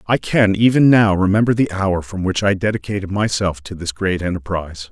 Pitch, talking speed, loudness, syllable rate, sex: 100 Hz, 195 wpm, -17 LUFS, 5.5 syllables/s, male